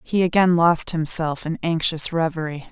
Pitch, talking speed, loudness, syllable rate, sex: 165 Hz, 155 wpm, -19 LUFS, 4.7 syllables/s, female